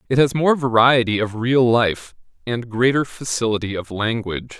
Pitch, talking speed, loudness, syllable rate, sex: 120 Hz, 155 wpm, -19 LUFS, 4.9 syllables/s, male